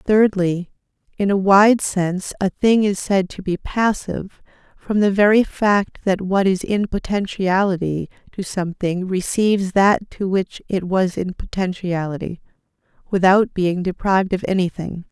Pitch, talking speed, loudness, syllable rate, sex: 190 Hz, 145 wpm, -19 LUFS, 4.4 syllables/s, female